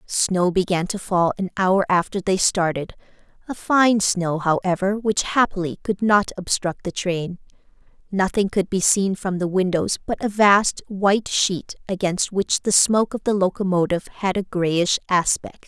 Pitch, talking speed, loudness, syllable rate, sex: 190 Hz, 165 wpm, -20 LUFS, 4.4 syllables/s, female